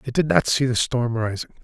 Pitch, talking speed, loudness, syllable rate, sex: 115 Hz, 260 wpm, -21 LUFS, 5.6 syllables/s, male